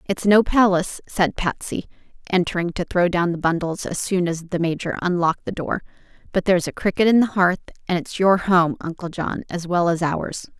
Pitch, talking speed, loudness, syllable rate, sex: 180 Hz, 205 wpm, -21 LUFS, 5.3 syllables/s, female